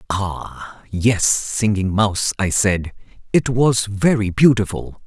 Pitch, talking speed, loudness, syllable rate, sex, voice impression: 105 Hz, 120 wpm, -18 LUFS, 3.5 syllables/s, male, masculine, middle-aged, thick, tensed, powerful, hard, raspy, intellectual, slightly mature, wild, slightly strict